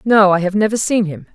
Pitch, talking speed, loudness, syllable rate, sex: 205 Hz, 265 wpm, -15 LUFS, 5.8 syllables/s, female